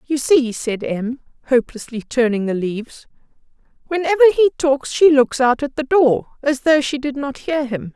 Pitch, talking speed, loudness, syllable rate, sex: 270 Hz, 180 wpm, -17 LUFS, 5.0 syllables/s, female